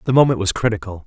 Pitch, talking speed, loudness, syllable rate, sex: 105 Hz, 225 wpm, -18 LUFS, 7.5 syllables/s, male